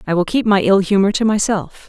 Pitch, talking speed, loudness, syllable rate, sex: 195 Hz, 255 wpm, -15 LUFS, 5.8 syllables/s, female